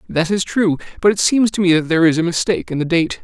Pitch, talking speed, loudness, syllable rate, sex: 180 Hz, 295 wpm, -16 LUFS, 6.7 syllables/s, male